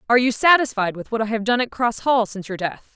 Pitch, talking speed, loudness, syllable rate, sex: 230 Hz, 285 wpm, -20 LUFS, 6.5 syllables/s, female